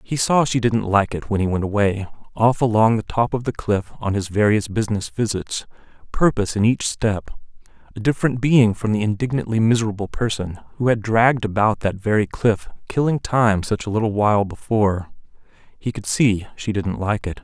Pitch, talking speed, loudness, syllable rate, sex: 110 Hz, 190 wpm, -20 LUFS, 5.4 syllables/s, male